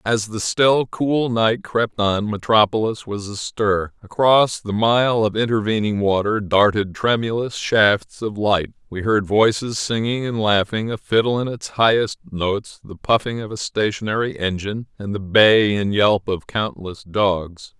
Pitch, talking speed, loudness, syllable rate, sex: 105 Hz, 160 wpm, -19 LUFS, 4.2 syllables/s, male